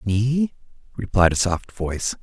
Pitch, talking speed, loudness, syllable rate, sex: 110 Hz, 135 wpm, -22 LUFS, 4.2 syllables/s, male